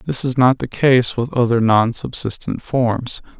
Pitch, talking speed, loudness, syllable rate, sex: 125 Hz, 175 wpm, -17 LUFS, 4.1 syllables/s, male